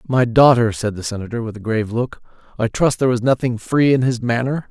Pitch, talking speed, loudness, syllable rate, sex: 120 Hz, 230 wpm, -18 LUFS, 6.0 syllables/s, male